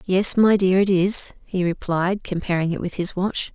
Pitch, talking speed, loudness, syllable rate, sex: 185 Hz, 205 wpm, -20 LUFS, 4.5 syllables/s, female